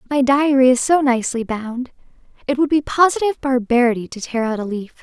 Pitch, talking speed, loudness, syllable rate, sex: 260 Hz, 180 wpm, -18 LUFS, 5.9 syllables/s, female